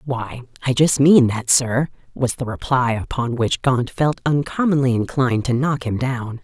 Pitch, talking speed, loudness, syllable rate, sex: 130 Hz, 175 wpm, -19 LUFS, 4.5 syllables/s, female